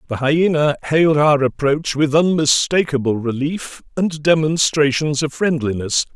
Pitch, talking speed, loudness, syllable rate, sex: 150 Hz, 115 wpm, -17 LUFS, 4.5 syllables/s, male